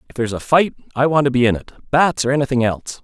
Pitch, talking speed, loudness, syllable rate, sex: 130 Hz, 275 wpm, -18 LUFS, 7.2 syllables/s, male